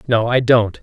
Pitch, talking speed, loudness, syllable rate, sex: 115 Hz, 220 wpm, -15 LUFS, 4.5 syllables/s, male